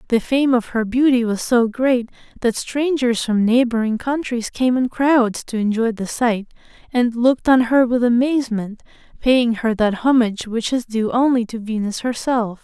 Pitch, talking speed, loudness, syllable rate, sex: 240 Hz, 175 wpm, -18 LUFS, 4.6 syllables/s, female